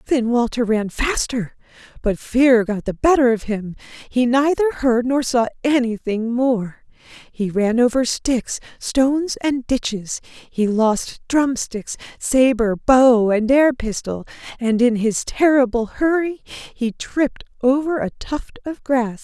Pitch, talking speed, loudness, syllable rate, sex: 245 Hz, 145 wpm, -19 LUFS, 3.7 syllables/s, female